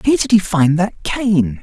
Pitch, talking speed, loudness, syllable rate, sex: 190 Hz, 220 wpm, -15 LUFS, 4.4 syllables/s, male